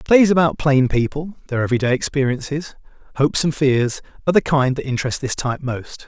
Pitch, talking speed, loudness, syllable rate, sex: 140 Hz, 180 wpm, -19 LUFS, 6.0 syllables/s, male